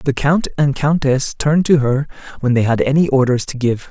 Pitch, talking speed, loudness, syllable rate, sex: 140 Hz, 215 wpm, -16 LUFS, 5.0 syllables/s, male